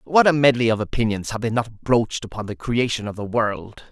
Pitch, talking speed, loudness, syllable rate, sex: 115 Hz, 230 wpm, -21 LUFS, 5.6 syllables/s, male